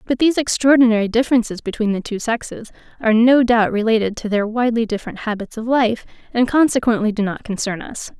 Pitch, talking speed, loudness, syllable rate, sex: 225 Hz, 185 wpm, -18 LUFS, 6.3 syllables/s, female